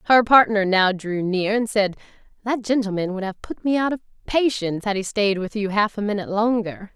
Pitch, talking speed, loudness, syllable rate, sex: 210 Hz, 215 wpm, -21 LUFS, 5.5 syllables/s, female